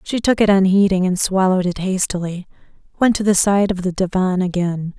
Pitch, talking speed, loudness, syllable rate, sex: 190 Hz, 195 wpm, -17 LUFS, 5.5 syllables/s, female